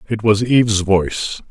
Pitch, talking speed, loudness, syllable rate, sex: 105 Hz, 160 wpm, -16 LUFS, 4.8 syllables/s, male